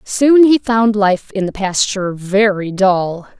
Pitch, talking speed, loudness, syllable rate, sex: 205 Hz, 160 wpm, -14 LUFS, 3.8 syllables/s, female